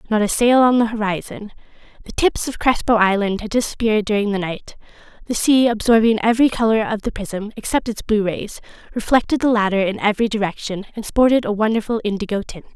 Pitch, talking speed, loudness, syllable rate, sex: 220 Hz, 190 wpm, -18 LUFS, 6.1 syllables/s, female